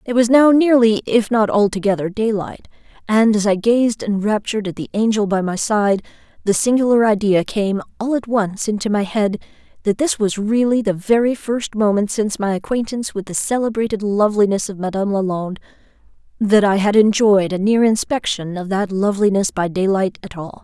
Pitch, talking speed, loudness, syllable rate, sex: 210 Hz, 175 wpm, -17 LUFS, 5.4 syllables/s, female